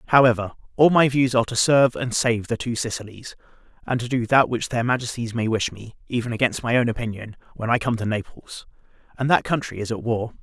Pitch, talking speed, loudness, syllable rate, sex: 120 Hz, 220 wpm, -22 LUFS, 6.1 syllables/s, male